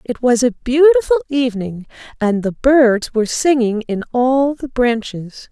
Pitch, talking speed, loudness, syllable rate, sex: 250 Hz, 150 wpm, -16 LUFS, 4.3 syllables/s, female